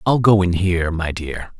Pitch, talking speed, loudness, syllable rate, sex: 95 Hz, 225 wpm, -18 LUFS, 4.9 syllables/s, male